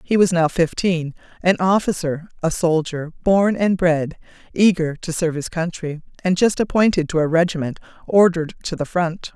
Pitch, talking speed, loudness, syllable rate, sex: 170 Hz, 165 wpm, -19 LUFS, 5.0 syllables/s, female